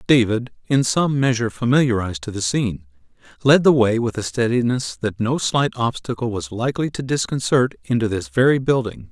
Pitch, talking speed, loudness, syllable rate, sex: 120 Hz, 170 wpm, -20 LUFS, 5.5 syllables/s, male